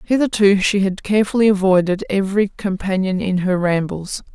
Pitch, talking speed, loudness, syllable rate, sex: 195 Hz, 140 wpm, -17 LUFS, 5.4 syllables/s, female